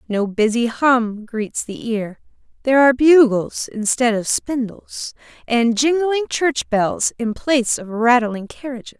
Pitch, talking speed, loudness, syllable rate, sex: 240 Hz, 140 wpm, -18 LUFS, 4.1 syllables/s, female